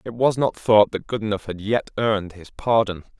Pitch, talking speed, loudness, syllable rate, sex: 105 Hz, 205 wpm, -21 LUFS, 5.2 syllables/s, male